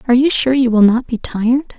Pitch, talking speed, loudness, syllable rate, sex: 245 Hz, 270 wpm, -14 LUFS, 6.3 syllables/s, female